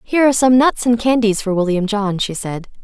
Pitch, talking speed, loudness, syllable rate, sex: 220 Hz, 235 wpm, -16 LUFS, 5.7 syllables/s, female